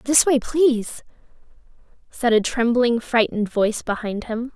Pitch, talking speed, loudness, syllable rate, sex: 240 Hz, 130 wpm, -20 LUFS, 4.6 syllables/s, female